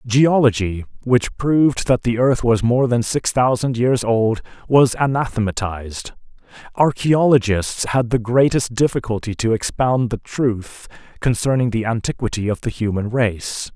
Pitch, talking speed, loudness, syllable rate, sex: 120 Hz, 135 wpm, -18 LUFS, 4.4 syllables/s, male